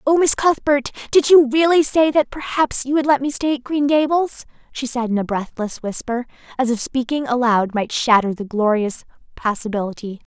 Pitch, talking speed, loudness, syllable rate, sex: 260 Hz, 185 wpm, -18 LUFS, 5.1 syllables/s, female